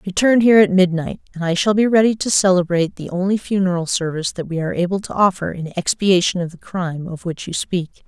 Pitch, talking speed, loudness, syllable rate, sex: 185 Hz, 225 wpm, -18 LUFS, 6.2 syllables/s, female